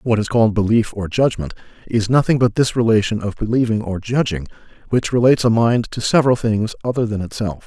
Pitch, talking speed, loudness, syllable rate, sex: 110 Hz, 195 wpm, -18 LUFS, 6.2 syllables/s, male